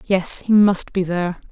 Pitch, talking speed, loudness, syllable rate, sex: 185 Hz, 200 wpm, -17 LUFS, 4.5 syllables/s, female